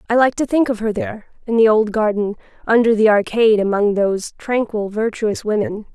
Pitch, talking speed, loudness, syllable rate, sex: 220 Hz, 190 wpm, -17 LUFS, 5.6 syllables/s, female